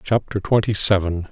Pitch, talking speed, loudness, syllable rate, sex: 100 Hz, 135 wpm, -19 LUFS, 5.0 syllables/s, male